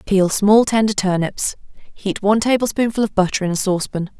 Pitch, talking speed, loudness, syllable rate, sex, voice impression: 205 Hz, 170 wpm, -18 LUFS, 5.6 syllables/s, female, very feminine, young, thin, tensed, slightly powerful, bright, soft, clear, fluent, cute, intellectual, very refreshing, sincere, calm, friendly, reassuring, unique, elegant, slightly wild, sweet, lively, kind, slightly intense, slightly sharp, slightly modest, light